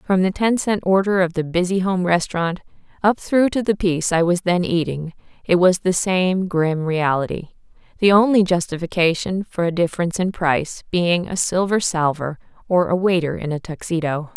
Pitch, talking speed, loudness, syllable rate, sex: 175 Hz, 180 wpm, -19 LUFS, 5.1 syllables/s, female